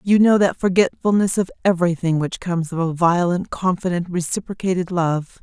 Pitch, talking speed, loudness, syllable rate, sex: 180 Hz, 155 wpm, -19 LUFS, 5.4 syllables/s, female